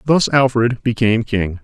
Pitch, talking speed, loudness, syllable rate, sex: 115 Hz, 145 wpm, -16 LUFS, 4.8 syllables/s, male